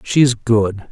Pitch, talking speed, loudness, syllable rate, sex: 115 Hz, 195 wpm, -15 LUFS, 3.7 syllables/s, male